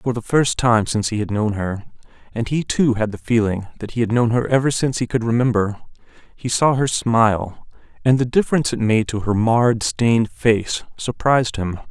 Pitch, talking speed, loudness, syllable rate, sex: 115 Hz, 195 wpm, -19 LUFS, 5.4 syllables/s, male